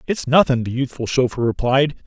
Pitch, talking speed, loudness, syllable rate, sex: 130 Hz, 175 wpm, -19 LUFS, 5.5 syllables/s, male